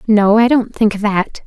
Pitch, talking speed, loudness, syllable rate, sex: 215 Hz, 205 wpm, -14 LUFS, 3.9 syllables/s, female